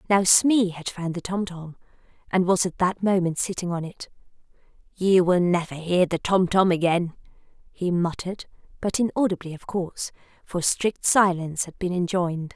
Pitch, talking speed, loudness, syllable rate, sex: 180 Hz, 165 wpm, -23 LUFS, 5.0 syllables/s, female